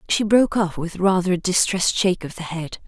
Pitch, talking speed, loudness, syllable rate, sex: 185 Hz, 230 wpm, -20 LUFS, 6.0 syllables/s, female